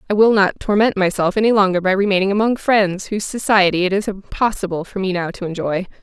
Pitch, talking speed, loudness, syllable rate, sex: 195 Hz, 210 wpm, -17 LUFS, 6.2 syllables/s, female